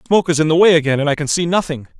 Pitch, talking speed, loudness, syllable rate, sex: 160 Hz, 360 wpm, -15 LUFS, 8.0 syllables/s, male